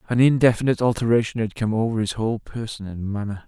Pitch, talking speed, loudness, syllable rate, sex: 110 Hz, 190 wpm, -22 LUFS, 6.7 syllables/s, male